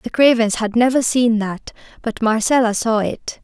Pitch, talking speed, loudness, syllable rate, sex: 230 Hz, 175 wpm, -17 LUFS, 4.6 syllables/s, female